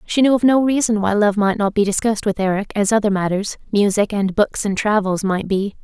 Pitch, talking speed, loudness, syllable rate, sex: 205 Hz, 215 wpm, -18 LUFS, 5.7 syllables/s, female